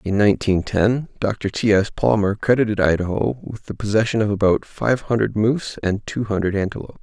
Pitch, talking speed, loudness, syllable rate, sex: 105 Hz, 180 wpm, -20 LUFS, 5.5 syllables/s, male